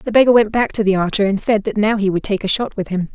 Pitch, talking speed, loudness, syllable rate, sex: 210 Hz, 345 wpm, -17 LUFS, 6.6 syllables/s, female